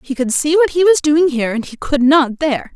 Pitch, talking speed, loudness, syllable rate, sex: 290 Hz, 285 wpm, -14 LUFS, 5.7 syllables/s, female